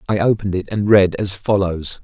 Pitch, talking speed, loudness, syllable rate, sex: 100 Hz, 205 wpm, -17 LUFS, 5.4 syllables/s, male